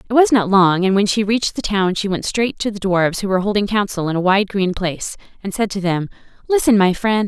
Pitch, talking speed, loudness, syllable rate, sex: 200 Hz, 265 wpm, -17 LUFS, 5.9 syllables/s, female